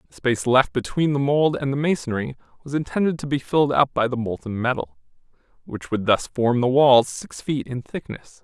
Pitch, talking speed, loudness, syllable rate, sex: 125 Hz, 205 wpm, -21 LUFS, 5.4 syllables/s, male